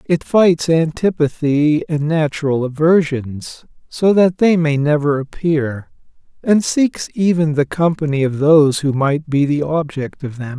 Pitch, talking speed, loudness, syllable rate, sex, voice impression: 155 Hz, 145 wpm, -16 LUFS, 4.1 syllables/s, male, masculine, adult-like, relaxed, slightly weak, soft, raspy, calm, friendly, reassuring, slightly lively, kind, slightly modest